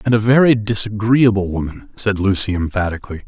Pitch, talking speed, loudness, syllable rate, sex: 105 Hz, 145 wpm, -16 LUFS, 5.8 syllables/s, male